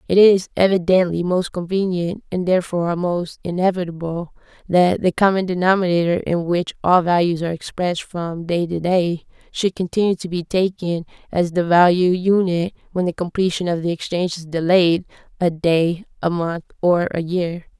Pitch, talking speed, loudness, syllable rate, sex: 175 Hz, 160 wpm, -19 LUFS, 5.1 syllables/s, female